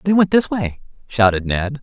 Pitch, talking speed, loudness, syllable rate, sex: 140 Hz, 195 wpm, -17 LUFS, 4.9 syllables/s, male